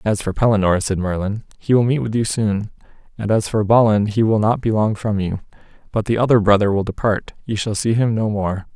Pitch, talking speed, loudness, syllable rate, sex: 105 Hz, 235 wpm, -18 LUFS, 5.7 syllables/s, male